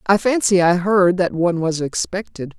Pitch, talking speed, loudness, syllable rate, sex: 185 Hz, 185 wpm, -17 LUFS, 4.9 syllables/s, female